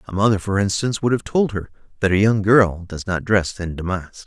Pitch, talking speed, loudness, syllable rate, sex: 100 Hz, 240 wpm, -20 LUFS, 5.5 syllables/s, male